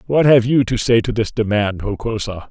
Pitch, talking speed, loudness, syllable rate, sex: 115 Hz, 215 wpm, -17 LUFS, 5.1 syllables/s, male